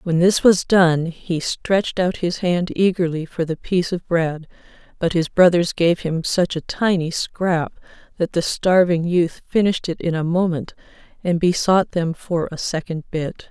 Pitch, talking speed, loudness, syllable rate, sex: 175 Hz, 180 wpm, -19 LUFS, 4.4 syllables/s, female